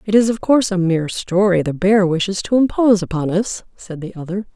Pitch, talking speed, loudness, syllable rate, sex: 190 Hz, 225 wpm, -17 LUFS, 5.9 syllables/s, female